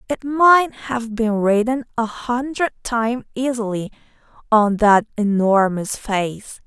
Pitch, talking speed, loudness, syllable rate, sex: 230 Hz, 115 wpm, -19 LUFS, 3.7 syllables/s, female